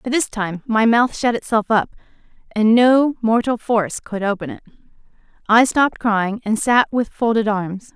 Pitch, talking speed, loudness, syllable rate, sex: 225 Hz, 165 wpm, -18 LUFS, 4.5 syllables/s, female